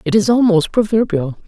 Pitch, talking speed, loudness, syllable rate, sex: 225 Hz, 165 wpm, -15 LUFS, 5.4 syllables/s, female